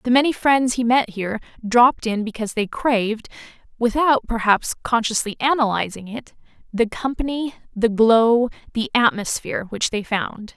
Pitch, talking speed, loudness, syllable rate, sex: 230 Hz, 140 wpm, -20 LUFS, 4.9 syllables/s, female